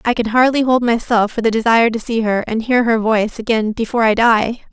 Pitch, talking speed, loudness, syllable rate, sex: 225 Hz, 240 wpm, -15 LUFS, 6.0 syllables/s, female